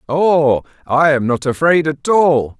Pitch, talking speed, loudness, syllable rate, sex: 145 Hz, 160 wpm, -14 LUFS, 3.7 syllables/s, male